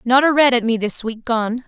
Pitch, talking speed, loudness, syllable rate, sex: 240 Hz, 285 wpm, -17 LUFS, 5.1 syllables/s, female